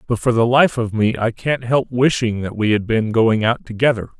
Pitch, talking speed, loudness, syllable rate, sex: 115 Hz, 245 wpm, -17 LUFS, 5.1 syllables/s, male